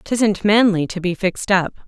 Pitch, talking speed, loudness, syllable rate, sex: 195 Hz, 190 wpm, -18 LUFS, 4.7 syllables/s, female